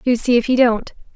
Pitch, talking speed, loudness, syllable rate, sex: 235 Hz, 260 wpm, -16 LUFS, 5.7 syllables/s, female